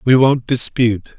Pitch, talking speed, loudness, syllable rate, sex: 120 Hz, 150 wpm, -15 LUFS, 4.6 syllables/s, male